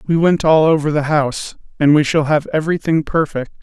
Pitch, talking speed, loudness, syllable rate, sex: 150 Hz, 200 wpm, -15 LUFS, 5.7 syllables/s, male